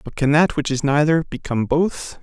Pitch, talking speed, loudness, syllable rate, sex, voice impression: 150 Hz, 215 wpm, -19 LUFS, 5.2 syllables/s, male, very masculine, very adult-like, slightly thick, tensed, slightly powerful, bright, soft, clear, fluent, slightly raspy, cool, very intellectual, very refreshing, sincere, calm, slightly mature, friendly, reassuring, unique, elegant, slightly wild, sweet, lively, kind, slightly modest